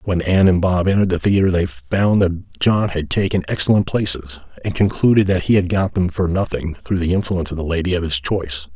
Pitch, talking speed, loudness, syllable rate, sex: 90 Hz, 225 wpm, -18 LUFS, 6.0 syllables/s, male